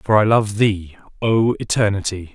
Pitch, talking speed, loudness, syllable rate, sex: 105 Hz, 155 wpm, -18 LUFS, 4.4 syllables/s, male